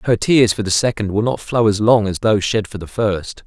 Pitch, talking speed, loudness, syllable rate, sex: 105 Hz, 275 wpm, -17 LUFS, 5.4 syllables/s, male